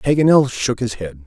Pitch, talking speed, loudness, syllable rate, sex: 115 Hz, 190 wpm, -17 LUFS, 5.0 syllables/s, male